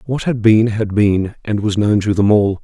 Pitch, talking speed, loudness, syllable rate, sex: 105 Hz, 250 wpm, -15 LUFS, 4.6 syllables/s, male